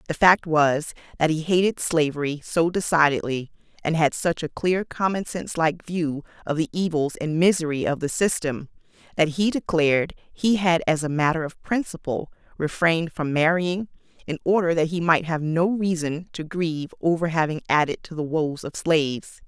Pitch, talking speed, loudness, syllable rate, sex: 165 Hz, 175 wpm, -23 LUFS, 5.1 syllables/s, female